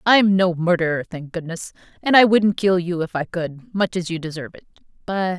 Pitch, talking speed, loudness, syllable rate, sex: 180 Hz, 190 wpm, -20 LUFS, 5.1 syllables/s, female